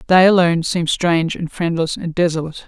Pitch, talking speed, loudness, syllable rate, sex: 170 Hz, 180 wpm, -17 LUFS, 6.5 syllables/s, female